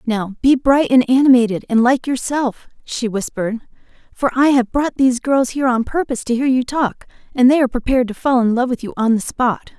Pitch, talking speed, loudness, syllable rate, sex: 250 Hz, 220 wpm, -16 LUFS, 5.8 syllables/s, female